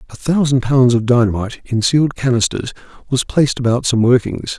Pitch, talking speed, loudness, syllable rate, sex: 125 Hz, 170 wpm, -15 LUFS, 5.8 syllables/s, male